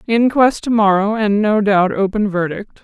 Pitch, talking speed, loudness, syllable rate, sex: 210 Hz, 170 wpm, -15 LUFS, 4.5 syllables/s, female